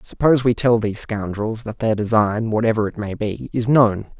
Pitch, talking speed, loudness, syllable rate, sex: 110 Hz, 200 wpm, -19 LUFS, 5.3 syllables/s, male